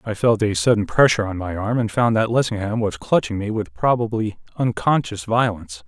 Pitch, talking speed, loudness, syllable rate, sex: 105 Hz, 195 wpm, -20 LUFS, 5.5 syllables/s, male